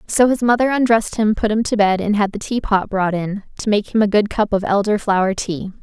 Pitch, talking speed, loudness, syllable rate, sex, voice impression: 210 Hz, 255 wpm, -18 LUFS, 5.7 syllables/s, female, very feminine, young, slightly thin, slightly tensed, slightly powerful, bright, soft, clear, slightly fluent, slightly raspy, very cute, intellectual, very refreshing, sincere, calm, very friendly, very reassuring, unique, very elegant, sweet, lively, kind, light